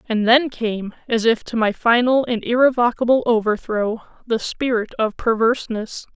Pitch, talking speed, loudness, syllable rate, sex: 230 Hz, 145 wpm, -19 LUFS, 4.6 syllables/s, female